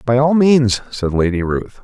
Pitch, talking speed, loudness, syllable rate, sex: 120 Hz, 195 wpm, -15 LUFS, 4.3 syllables/s, male